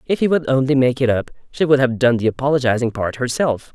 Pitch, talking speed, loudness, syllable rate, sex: 130 Hz, 240 wpm, -18 LUFS, 6.1 syllables/s, male